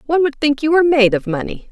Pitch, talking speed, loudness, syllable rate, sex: 275 Hz, 280 wpm, -15 LUFS, 7.0 syllables/s, female